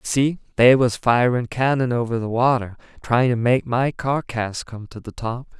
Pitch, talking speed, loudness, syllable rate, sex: 120 Hz, 195 wpm, -20 LUFS, 4.8 syllables/s, male